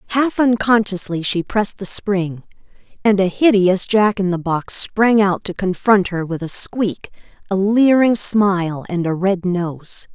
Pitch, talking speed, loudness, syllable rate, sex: 195 Hz, 165 wpm, -17 LUFS, 4.1 syllables/s, female